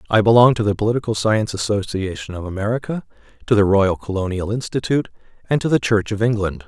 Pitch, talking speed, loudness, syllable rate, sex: 105 Hz, 180 wpm, -19 LUFS, 6.5 syllables/s, male